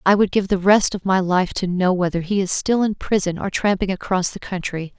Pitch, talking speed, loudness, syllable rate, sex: 190 Hz, 255 wpm, -20 LUFS, 5.3 syllables/s, female